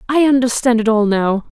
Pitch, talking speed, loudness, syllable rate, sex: 235 Hz, 190 wpm, -15 LUFS, 5.3 syllables/s, female